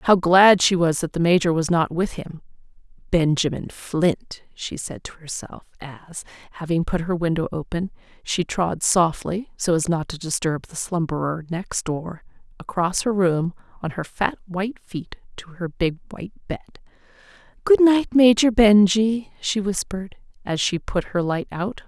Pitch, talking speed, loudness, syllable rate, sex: 180 Hz, 165 wpm, -21 LUFS, 4.0 syllables/s, female